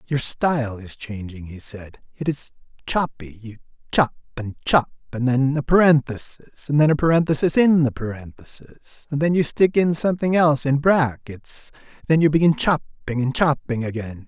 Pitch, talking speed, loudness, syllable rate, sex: 140 Hz, 155 wpm, -20 LUFS, 4.8 syllables/s, male